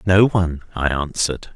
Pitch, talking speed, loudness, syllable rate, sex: 85 Hz, 155 wpm, -19 LUFS, 5.4 syllables/s, male